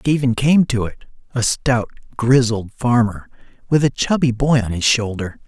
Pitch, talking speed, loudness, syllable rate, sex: 120 Hz, 165 wpm, -18 LUFS, 4.6 syllables/s, male